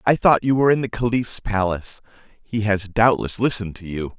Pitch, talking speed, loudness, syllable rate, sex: 110 Hz, 200 wpm, -20 LUFS, 5.7 syllables/s, male